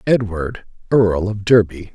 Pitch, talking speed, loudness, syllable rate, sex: 100 Hz, 125 wpm, -17 LUFS, 3.9 syllables/s, male